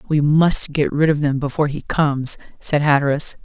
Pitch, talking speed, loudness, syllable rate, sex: 145 Hz, 190 wpm, -17 LUFS, 5.3 syllables/s, female